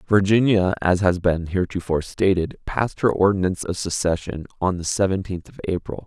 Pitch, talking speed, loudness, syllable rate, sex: 95 Hz, 160 wpm, -21 LUFS, 5.8 syllables/s, male